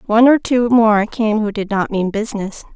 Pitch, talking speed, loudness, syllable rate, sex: 220 Hz, 220 wpm, -16 LUFS, 5.2 syllables/s, female